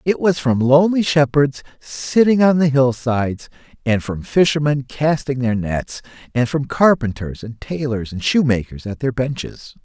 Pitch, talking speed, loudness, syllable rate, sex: 135 Hz, 150 wpm, -18 LUFS, 4.5 syllables/s, male